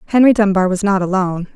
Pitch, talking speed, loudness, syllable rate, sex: 195 Hz, 195 wpm, -15 LUFS, 6.8 syllables/s, female